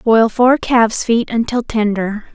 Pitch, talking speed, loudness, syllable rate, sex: 225 Hz, 155 wpm, -15 LUFS, 4.1 syllables/s, female